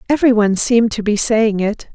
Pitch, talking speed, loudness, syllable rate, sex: 220 Hz, 185 wpm, -15 LUFS, 5.7 syllables/s, female